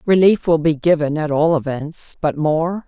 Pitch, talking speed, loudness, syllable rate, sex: 160 Hz, 190 wpm, -17 LUFS, 4.4 syllables/s, female